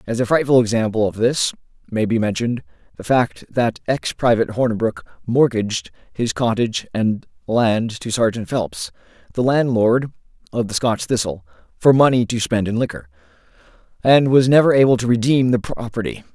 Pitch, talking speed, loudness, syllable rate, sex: 115 Hz, 160 wpm, -18 LUFS, 5.3 syllables/s, male